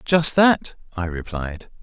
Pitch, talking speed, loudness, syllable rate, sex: 120 Hz, 130 wpm, -20 LUFS, 3.5 syllables/s, male